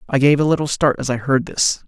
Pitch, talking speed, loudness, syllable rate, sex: 140 Hz, 285 wpm, -17 LUFS, 6.1 syllables/s, male